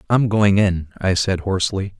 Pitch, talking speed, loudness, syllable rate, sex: 95 Hz, 180 wpm, -19 LUFS, 4.8 syllables/s, male